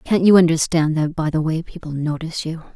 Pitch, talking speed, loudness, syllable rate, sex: 160 Hz, 220 wpm, -19 LUFS, 5.9 syllables/s, female